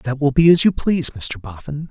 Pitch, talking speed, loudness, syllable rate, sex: 140 Hz, 250 wpm, -16 LUFS, 5.4 syllables/s, male